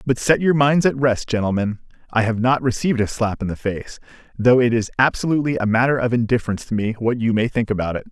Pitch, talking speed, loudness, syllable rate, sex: 120 Hz, 235 wpm, -19 LUFS, 6.3 syllables/s, male